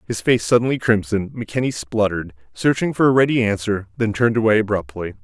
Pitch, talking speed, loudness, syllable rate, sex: 110 Hz, 170 wpm, -19 LUFS, 6.3 syllables/s, male